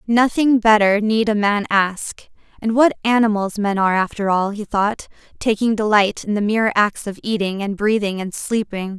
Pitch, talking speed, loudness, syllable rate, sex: 210 Hz, 180 wpm, -18 LUFS, 4.9 syllables/s, female